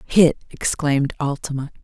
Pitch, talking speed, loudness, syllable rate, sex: 145 Hz, 100 wpm, -21 LUFS, 4.7 syllables/s, female